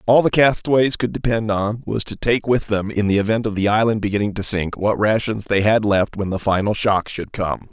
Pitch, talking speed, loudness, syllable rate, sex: 105 Hz, 240 wpm, -19 LUFS, 5.3 syllables/s, male